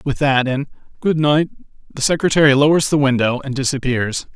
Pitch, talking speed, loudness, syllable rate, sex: 140 Hz, 165 wpm, -17 LUFS, 5.5 syllables/s, male